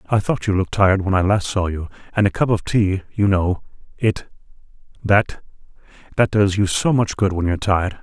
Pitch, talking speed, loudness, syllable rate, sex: 100 Hz, 195 wpm, -19 LUFS, 5.6 syllables/s, male